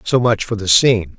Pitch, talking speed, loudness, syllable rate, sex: 105 Hz, 255 wpm, -15 LUFS, 5.5 syllables/s, male